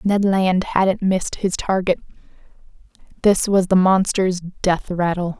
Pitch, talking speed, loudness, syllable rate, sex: 185 Hz, 135 wpm, -19 LUFS, 4.0 syllables/s, female